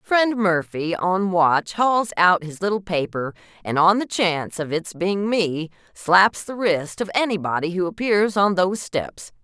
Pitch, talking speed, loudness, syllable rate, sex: 185 Hz, 170 wpm, -21 LUFS, 4.1 syllables/s, female